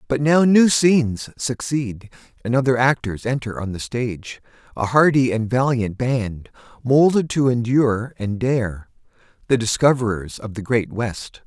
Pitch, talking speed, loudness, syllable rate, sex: 120 Hz, 140 wpm, -19 LUFS, 4.4 syllables/s, male